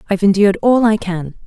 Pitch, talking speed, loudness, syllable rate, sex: 200 Hz, 205 wpm, -14 LUFS, 6.8 syllables/s, female